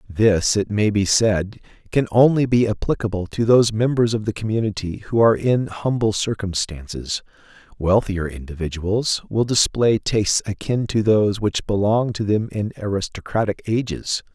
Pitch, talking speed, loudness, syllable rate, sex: 105 Hz, 145 wpm, -20 LUFS, 4.9 syllables/s, male